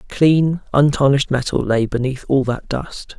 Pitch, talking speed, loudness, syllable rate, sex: 135 Hz, 150 wpm, -17 LUFS, 4.5 syllables/s, male